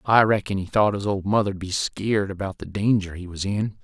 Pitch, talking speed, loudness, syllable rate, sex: 100 Hz, 235 wpm, -23 LUFS, 5.4 syllables/s, male